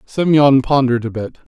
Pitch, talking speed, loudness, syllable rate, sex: 130 Hz, 155 wpm, -14 LUFS, 5.2 syllables/s, male